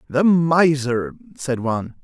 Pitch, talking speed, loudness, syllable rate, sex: 145 Hz, 120 wpm, -19 LUFS, 3.7 syllables/s, male